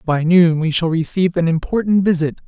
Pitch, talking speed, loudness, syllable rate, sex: 170 Hz, 195 wpm, -16 LUFS, 5.6 syllables/s, female